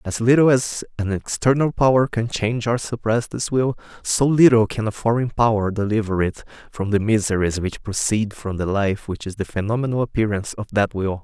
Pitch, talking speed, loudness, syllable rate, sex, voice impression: 110 Hz, 190 wpm, -20 LUFS, 5.4 syllables/s, male, masculine, adult-like, tensed, slightly powerful, clear, slightly halting, sincere, calm, friendly, wild, lively